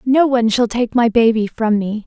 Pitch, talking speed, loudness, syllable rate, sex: 230 Hz, 235 wpm, -15 LUFS, 5.1 syllables/s, female